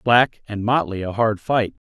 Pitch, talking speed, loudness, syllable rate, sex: 110 Hz, 190 wpm, -21 LUFS, 4.2 syllables/s, male